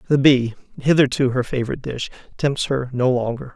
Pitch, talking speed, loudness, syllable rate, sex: 130 Hz, 170 wpm, -20 LUFS, 5.7 syllables/s, male